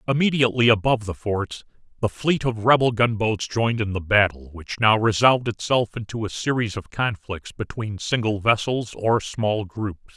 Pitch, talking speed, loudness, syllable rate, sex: 110 Hz, 165 wpm, -22 LUFS, 5.0 syllables/s, male